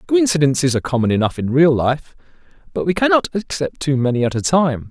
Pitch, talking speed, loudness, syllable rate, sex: 150 Hz, 195 wpm, -17 LUFS, 6.0 syllables/s, male